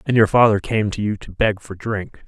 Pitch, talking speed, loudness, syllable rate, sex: 105 Hz, 265 wpm, -19 LUFS, 5.1 syllables/s, male